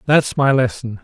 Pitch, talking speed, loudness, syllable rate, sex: 130 Hz, 175 wpm, -17 LUFS, 4.6 syllables/s, male